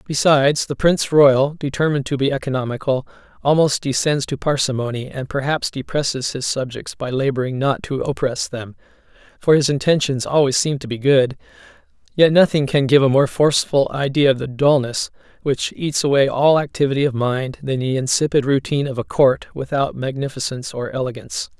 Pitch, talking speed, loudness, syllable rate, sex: 135 Hz, 165 wpm, -18 LUFS, 5.6 syllables/s, male